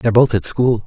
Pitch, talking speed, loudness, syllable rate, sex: 110 Hz, 275 wpm, -16 LUFS, 6.0 syllables/s, male